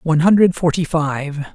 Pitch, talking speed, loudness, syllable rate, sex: 160 Hz, 155 wpm, -16 LUFS, 4.9 syllables/s, male